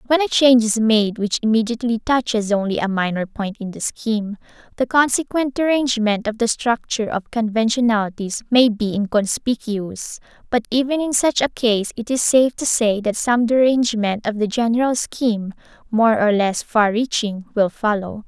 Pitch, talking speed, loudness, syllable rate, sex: 225 Hz, 165 wpm, -19 LUFS, 5.1 syllables/s, female